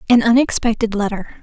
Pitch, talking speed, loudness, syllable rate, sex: 225 Hz, 125 wpm, -16 LUFS, 5.6 syllables/s, female